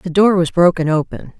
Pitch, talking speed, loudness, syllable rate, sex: 175 Hz, 215 wpm, -15 LUFS, 5.3 syllables/s, female